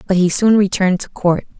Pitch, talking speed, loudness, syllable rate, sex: 190 Hz, 225 wpm, -15 LUFS, 6.0 syllables/s, female